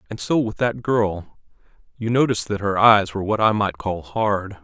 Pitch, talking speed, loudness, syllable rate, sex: 105 Hz, 205 wpm, -20 LUFS, 4.9 syllables/s, male